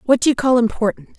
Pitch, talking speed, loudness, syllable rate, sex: 235 Hz, 255 wpm, -17 LUFS, 6.9 syllables/s, female